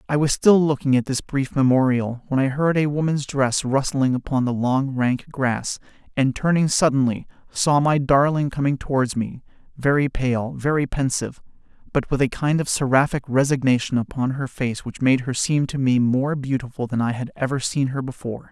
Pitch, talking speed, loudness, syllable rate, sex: 135 Hz, 190 wpm, -21 LUFS, 5.1 syllables/s, male